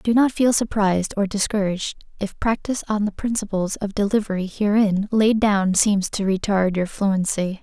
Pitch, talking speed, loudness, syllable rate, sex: 205 Hz, 165 wpm, -21 LUFS, 5.0 syllables/s, female